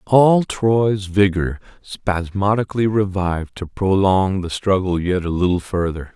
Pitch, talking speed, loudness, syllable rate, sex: 95 Hz, 125 wpm, -19 LUFS, 4.1 syllables/s, male